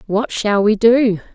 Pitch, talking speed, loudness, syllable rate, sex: 215 Hz, 180 wpm, -15 LUFS, 3.7 syllables/s, female